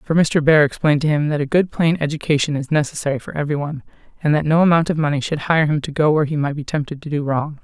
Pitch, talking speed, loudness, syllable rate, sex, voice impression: 150 Hz, 265 wpm, -18 LUFS, 6.8 syllables/s, female, very feminine, slightly young, thin, tensed, slightly weak, bright, hard, slightly clear, fluent, slightly raspy, slightly cute, cool, intellectual, very refreshing, very sincere, calm, friendly, reassuring, unique, very elegant, slightly wild, sweet, slightly lively, kind, slightly intense, modest, slightly light